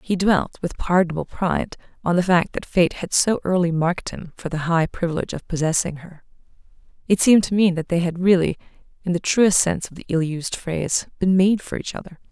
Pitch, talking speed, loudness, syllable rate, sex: 175 Hz, 215 wpm, -21 LUFS, 5.9 syllables/s, female